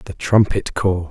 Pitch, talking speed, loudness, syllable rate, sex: 95 Hz, 165 wpm, -18 LUFS, 4.2 syllables/s, male